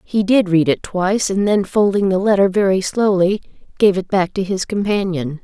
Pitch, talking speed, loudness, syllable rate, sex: 190 Hz, 200 wpm, -17 LUFS, 5.1 syllables/s, female